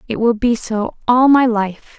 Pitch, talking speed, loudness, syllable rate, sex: 230 Hz, 210 wpm, -15 LUFS, 4.1 syllables/s, female